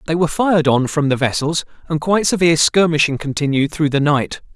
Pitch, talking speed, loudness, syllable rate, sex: 155 Hz, 195 wpm, -16 LUFS, 6.2 syllables/s, male